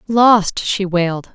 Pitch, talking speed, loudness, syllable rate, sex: 195 Hz, 135 wpm, -15 LUFS, 3.4 syllables/s, female